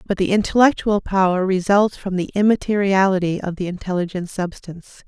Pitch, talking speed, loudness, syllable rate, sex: 190 Hz, 140 wpm, -19 LUFS, 5.5 syllables/s, female